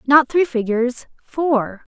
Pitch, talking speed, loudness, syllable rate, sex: 260 Hz, 125 wpm, -18 LUFS, 3.9 syllables/s, female